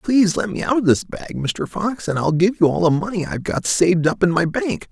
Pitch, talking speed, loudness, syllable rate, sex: 180 Hz, 280 wpm, -19 LUFS, 5.7 syllables/s, male